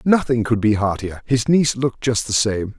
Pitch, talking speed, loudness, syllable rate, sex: 120 Hz, 215 wpm, -19 LUFS, 5.3 syllables/s, male